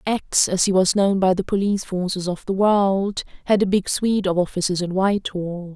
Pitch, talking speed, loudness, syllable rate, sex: 190 Hz, 210 wpm, -20 LUFS, 5.2 syllables/s, female